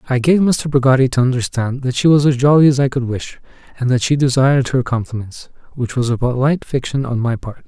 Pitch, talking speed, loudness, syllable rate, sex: 130 Hz, 220 wpm, -16 LUFS, 6.0 syllables/s, male